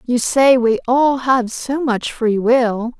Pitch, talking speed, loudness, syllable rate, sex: 245 Hz, 180 wpm, -16 LUFS, 3.3 syllables/s, female